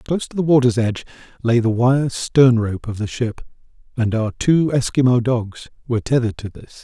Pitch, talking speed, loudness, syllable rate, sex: 120 Hz, 195 wpm, -18 LUFS, 5.3 syllables/s, male